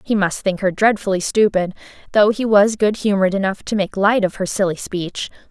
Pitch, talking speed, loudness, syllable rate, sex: 200 Hz, 205 wpm, -18 LUFS, 5.4 syllables/s, female